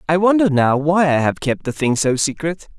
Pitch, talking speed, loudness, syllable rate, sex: 155 Hz, 235 wpm, -17 LUFS, 5.1 syllables/s, male